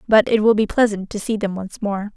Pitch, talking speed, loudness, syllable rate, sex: 210 Hz, 280 wpm, -19 LUFS, 5.5 syllables/s, female